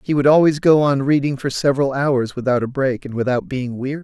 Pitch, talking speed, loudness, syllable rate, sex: 135 Hz, 240 wpm, -18 LUFS, 5.9 syllables/s, male